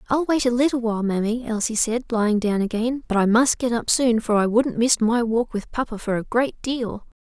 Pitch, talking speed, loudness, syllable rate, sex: 230 Hz, 240 wpm, -21 LUFS, 5.4 syllables/s, female